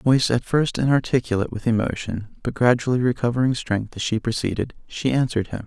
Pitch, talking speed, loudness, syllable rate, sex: 120 Hz, 190 wpm, -22 LUFS, 6.6 syllables/s, male